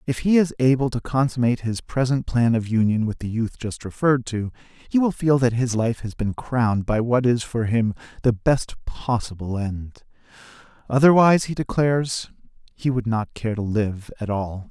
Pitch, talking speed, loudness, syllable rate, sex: 120 Hz, 190 wpm, -22 LUFS, 5.0 syllables/s, male